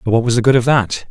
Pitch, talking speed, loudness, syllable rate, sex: 120 Hz, 380 wpm, -14 LUFS, 7.1 syllables/s, male